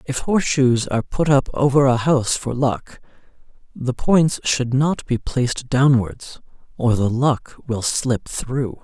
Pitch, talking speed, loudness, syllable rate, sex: 130 Hz, 155 wpm, -19 LUFS, 4.0 syllables/s, male